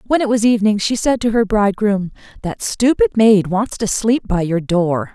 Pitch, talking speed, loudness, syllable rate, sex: 210 Hz, 210 wpm, -16 LUFS, 4.9 syllables/s, female